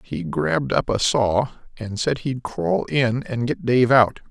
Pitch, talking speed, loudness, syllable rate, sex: 120 Hz, 195 wpm, -21 LUFS, 3.9 syllables/s, male